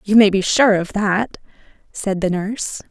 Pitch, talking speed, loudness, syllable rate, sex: 200 Hz, 185 wpm, -18 LUFS, 4.6 syllables/s, female